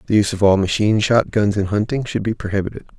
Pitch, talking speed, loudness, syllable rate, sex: 105 Hz, 220 wpm, -18 LUFS, 7.0 syllables/s, male